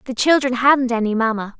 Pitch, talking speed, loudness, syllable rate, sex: 245 Hz, 190 wpm, -17 LUFS, 5.6 syllables/s, female